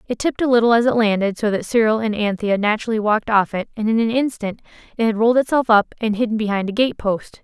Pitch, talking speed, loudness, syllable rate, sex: 220 Hz, 250 wpm, -18 LUFS, 6.6 syllables/s, female